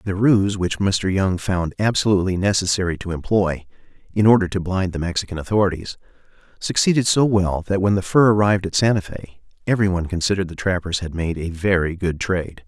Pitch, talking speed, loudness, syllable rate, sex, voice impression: 95 Hz, 185 wpm, -20 LUFS, 6.0 syllables/s, male, very masculine, very middle-aged, very thick, tensed, powerful, slightly dark, soft, slightly muffled, fluent, cool, very intellectual, slightly refreshing, sincere, very calm, mature, very friendly, very reassuring, very unique, elegant, wild, very sweet, lively, kind, slightly intense, slightly modest